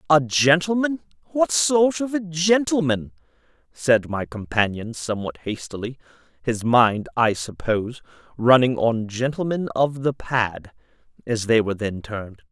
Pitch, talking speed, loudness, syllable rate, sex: 135 Hz, 120 wpm, -21 LUFS, 4.5 syllables/s, male